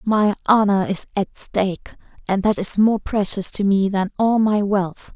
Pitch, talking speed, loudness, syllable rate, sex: 200 Hz, 185 wpm, -19 LUFS, 4.2 syllables/s, female